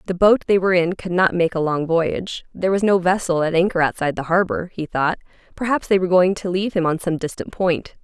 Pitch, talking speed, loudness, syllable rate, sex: 180 Hz, 245 wpm, -19 LUFS, 6.2 syllables/s, female